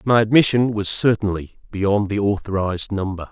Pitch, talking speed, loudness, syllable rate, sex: 105 Hz, 145 wpm, -19 LUFS, 5.2 syllables/s, male